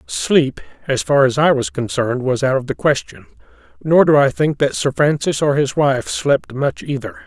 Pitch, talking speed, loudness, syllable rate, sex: 140 Hz, 205 wpm, -17 LUFS, 4.9 syllables/s, male